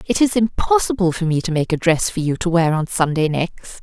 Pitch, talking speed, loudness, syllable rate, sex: 175 Hz, 250 wpm, -18 LUFS, 5.6 syllables/s, female